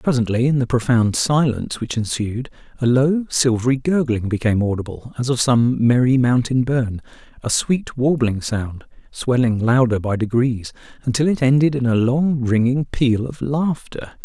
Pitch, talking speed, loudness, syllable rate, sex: 125 Hz, 150 wpm, -19 LUFS, 4.7 syllables/s, male